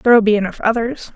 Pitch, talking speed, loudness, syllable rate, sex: 225 Hz, 210 wpm, -16 LUFS, 6.4 syllables/s, female